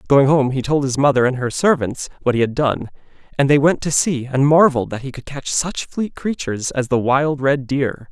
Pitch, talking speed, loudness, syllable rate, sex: 140 Hz, 235 wpm, -18 LUFS, 5.2 syllables/s, male